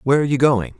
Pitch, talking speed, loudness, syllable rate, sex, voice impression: 135 Hz, 305 wpm, -17 LUFS, 8.8 syllables/s, male, masculine, adult-like, slightly thick, cool, slightly intellectual